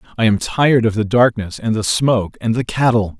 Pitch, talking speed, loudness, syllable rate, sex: 110 Hz, 225 wpm, -16 LUFS, 5.8 syllables/s, male